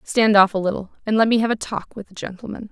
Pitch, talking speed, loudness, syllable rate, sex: 210 Hz, 285 wpm, -19 LUFS, 6.7 syllables/s, female